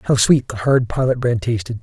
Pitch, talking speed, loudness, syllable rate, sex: 120 Hz, 230 wpm, -17 LUFS, 5.1 syllables/s, male